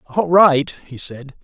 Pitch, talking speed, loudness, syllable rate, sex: 150 Hz, 165 wpm, -14 LUFS, 3.5 syllables/s, male